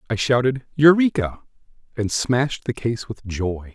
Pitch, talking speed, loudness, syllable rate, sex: 120 Hz, 145 wpm, -21 LUFS, 4.4 syllables/s, male